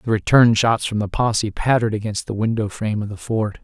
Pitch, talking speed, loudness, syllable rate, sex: 110 Hz, 230 wpm, -19 LUFS, 6.0 syllables/s, male